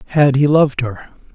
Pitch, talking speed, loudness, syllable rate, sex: 135 Hz, 180 wpm, -15 LUFS, 5.6 syllables/s, male